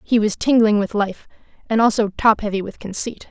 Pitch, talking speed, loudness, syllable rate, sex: 215 Hz, 200 wpm, -19 LUFS, 5.4 syllables/s, female